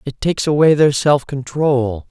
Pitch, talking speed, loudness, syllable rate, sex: 140 Hz, 170 wpm, -16 LUFS, 4.5 syllables/s, male